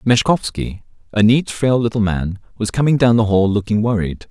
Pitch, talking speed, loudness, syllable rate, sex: 110 Hz, 180 wpm, -17 LUFS, 5.0 syllables/s, male